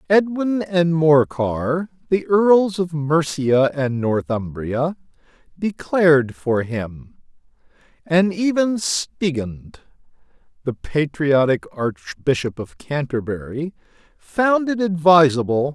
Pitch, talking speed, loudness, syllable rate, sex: 155 Hz, 90 wpm, -19 LUFS, 3.3 syllables/s, male